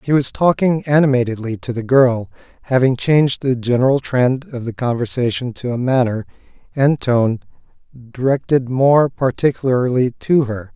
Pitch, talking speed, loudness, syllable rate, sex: 130 Hz, 140 wpm, -17 LUFS, 4.7 syllables/s, male